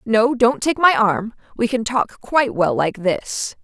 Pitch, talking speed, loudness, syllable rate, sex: 225 Hz, 180 wpm, -18 LUFS, 4.0 syllables/s, female